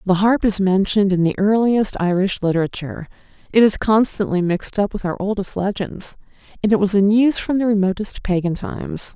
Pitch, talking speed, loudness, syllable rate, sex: 195 Hz, 185 wpm, -18 LUFS, 5.7 syllables/s, female